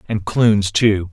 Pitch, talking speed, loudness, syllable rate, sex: 105 Hz, 160 wpm, -16 LUFS, 3.2 syllables/s, male